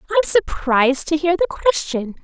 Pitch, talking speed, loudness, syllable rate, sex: 315 Hz, 160 wpm, -18 LUFS, 5.6 syllables/s, female